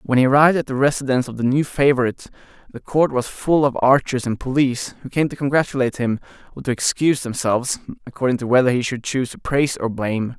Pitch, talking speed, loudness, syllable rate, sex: 130 Hz, 215 wpm, -19 LUFS, 6.8 syllables/s, male